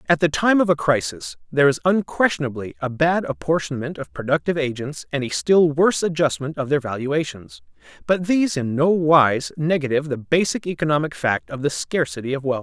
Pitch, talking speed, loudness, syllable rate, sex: 150 Hz, 180 wpm, -21 LUFS, 5.6 syllables/s, male